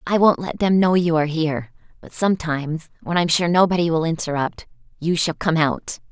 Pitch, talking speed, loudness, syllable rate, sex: 165 Hz, 195 wpm, -20 LUFS, 5.6 syllables/s, female